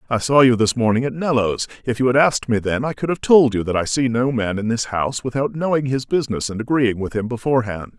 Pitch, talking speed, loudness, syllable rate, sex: 125 Hz, 265 wpm, -19 LUFS, 6.2 syllables/s, male